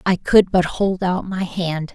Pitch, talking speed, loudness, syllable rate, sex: 180 Hz, 215 wpm, -19 LUFS, 3.8 syllables/s, female